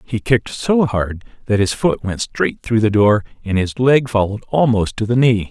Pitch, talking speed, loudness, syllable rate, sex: 110 Hz, 220 wpm, -17 LUFS, 4.9 syllables/s, male